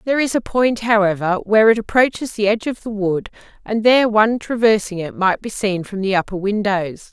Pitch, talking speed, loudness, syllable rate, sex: 210 Hz, 210 wpm, -17 LUFS, 5.7 syllables/s, female